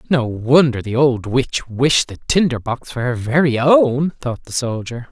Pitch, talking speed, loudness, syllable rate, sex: 130 Hz, 190 wpm, -17 LUFS, 4.1 syllables/s, male